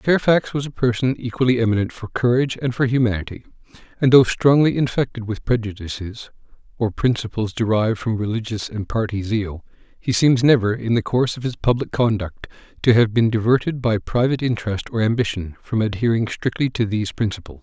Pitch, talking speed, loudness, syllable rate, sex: 115 Hz, 170 wpm, -20 LUFS, 5.8 syllables/s, male